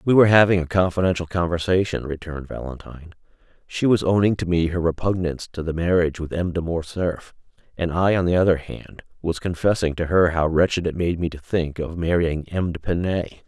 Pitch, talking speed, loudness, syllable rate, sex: 85 Hz, 190 wpm, -22 LUFS, 5.7 syllables/s, male